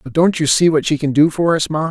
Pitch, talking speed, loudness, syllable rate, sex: 155 Hz, 345 wpm, -15 LUFS, 5.7 syllables/s, male